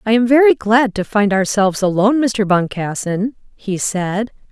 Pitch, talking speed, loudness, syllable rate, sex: 210 Hz, 160 wpm, -16 LUFS, 4.7 syllables/s, female